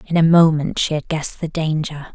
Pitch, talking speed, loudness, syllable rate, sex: 155 Hz, 225 wpm, -18 LUFS, 5.5 syllables/s, female